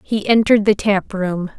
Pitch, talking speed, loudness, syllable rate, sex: 200 Hz, 190 wpm, -16 LUFS, 4.8 syllables/s, female